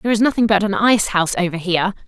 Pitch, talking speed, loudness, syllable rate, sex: 200 Hz, 260 wpm, -17 LUFS, 7.9 syllables/s, female